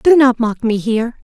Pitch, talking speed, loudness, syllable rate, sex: 240 Hz, 230 wpm, -15 LUFS, 5.0 syllables/s, female